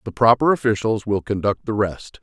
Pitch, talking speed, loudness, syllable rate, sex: 110 Hz, 190 wpm, -20 LUFS, 5.2 syllables/s, male